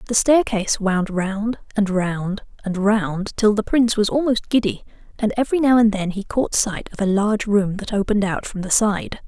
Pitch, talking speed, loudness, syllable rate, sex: 210 Hz, 205 wpm, -20 LUFS, 5.1 syllables/s, female